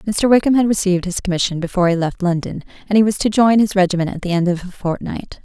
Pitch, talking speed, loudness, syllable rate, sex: 190 Hz, 255 wpm, -17 LUFS, 6.7 syllables/s, female